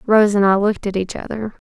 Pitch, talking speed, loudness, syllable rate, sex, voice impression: 205 Hz, 250 wpm, -18 LUFS, 6.2 syllables/s, female, very feminine, young, slightly adult-like, very thin, tensed, slightly weak, bright, very soft, very clear, fluent, slightly raspy, very cute, intellectual, very refreshing, sincere, calm, friendly, reassuring, very unique, elegant, slightly wild, sweet, lively, kind, slightly modest, very light